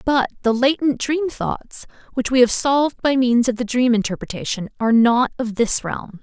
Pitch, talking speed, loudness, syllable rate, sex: 245 Hz, 195 wpm, -19 LUFS, 4.9 syllables/s, female